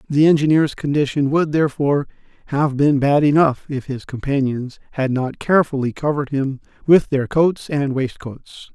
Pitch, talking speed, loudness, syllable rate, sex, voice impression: 140 Hz, 150 wpm, -18 LUFS, 5.0 syllables/s, male, very masculine, very adult-like, slightly old, very thick, slightly tensed, powerful, slightly dark, hard, slightly muffled, fluent, slightly raspy, cool, slightly intellectual, sincere, very calm, very mature, very friendly, reassuring, unique, slightly elegant, wild, slightly sweet, slightly lively, strict